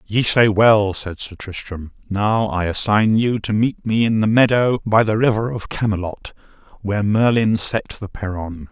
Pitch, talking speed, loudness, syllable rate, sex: 105 Hz, 180 wpm, -18 LUFS, 4.4 syllables/s, male